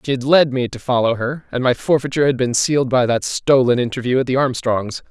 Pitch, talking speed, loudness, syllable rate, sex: 130 Hz, 235 wpm, -17 LUFS, 5.9 syllables/s, male